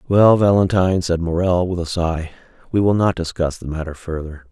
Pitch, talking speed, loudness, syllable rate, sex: 90 Hz, 185 wpm, -18 LUFS, 5.4 syllables/s, male